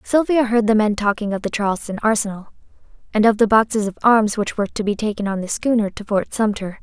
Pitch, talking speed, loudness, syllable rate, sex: 215 Hz, 230 wpm, -19 LUFS, 6.1 syllables/s, female